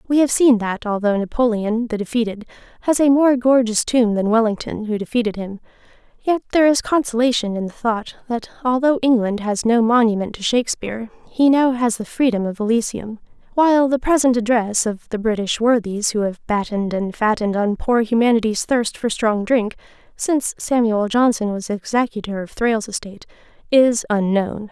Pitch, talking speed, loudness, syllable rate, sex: 230 Hz, 170 wpm, -19 LUFS, 5.4 syllables/s, female